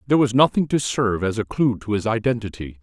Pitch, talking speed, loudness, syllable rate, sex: 115 Hz, 235 wpm, -21 LUFS, 6.4 syllables/s, male